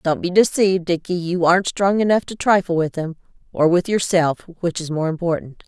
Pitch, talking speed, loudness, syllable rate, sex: 175 Hz, 190 wpm, -19 LUFS, 5.5 syllables/s, female